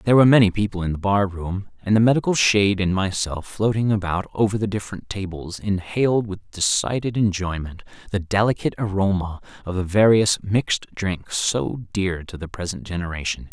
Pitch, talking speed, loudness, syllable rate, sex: 100 Hz, 170 wpm, -21 LUFS, 5.5 syllables/s, male